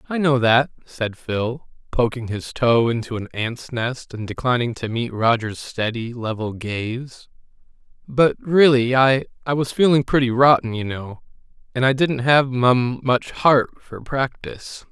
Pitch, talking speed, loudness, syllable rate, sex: 125 Hz, 155 wpm, -20 LUFS, 4.1 syllables/s, male